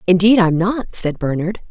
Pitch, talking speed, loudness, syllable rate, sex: 190 Hz, 175 wpm, -16 LUFS, 4.8 syllables/s, female